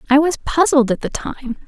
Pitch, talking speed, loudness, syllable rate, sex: 280 Hz, 215 wpm, -17 LUFS, 5.0 syllables/s, female